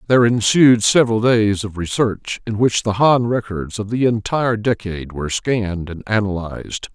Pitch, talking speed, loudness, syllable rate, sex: 110 Hz, 165 wpm, -18 LUFS, 5.1 syllables/s, male